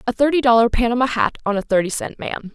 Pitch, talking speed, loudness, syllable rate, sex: 235 Hz, 235 wpm, -18 LUFS, 6.4 syllables/s, female